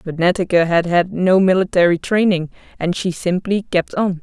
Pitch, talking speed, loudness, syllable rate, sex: 180 Hz, 170 wpm, -17 LUFS, 4.9 syllables/s, female